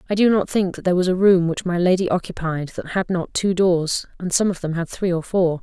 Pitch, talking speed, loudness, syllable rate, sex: 180 Hz, 275 wpm, -20 LUFS, 5.6 syllables/s, female